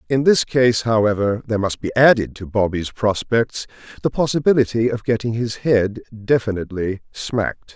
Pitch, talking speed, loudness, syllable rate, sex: 115 Hz, 145 wpm, -19 LUFS, 5.1 syllables/s, male